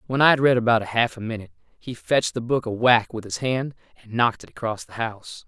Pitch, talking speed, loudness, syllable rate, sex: 115 Hz, 250 wpm, -22 LUFS, 6.3 syllables/s, male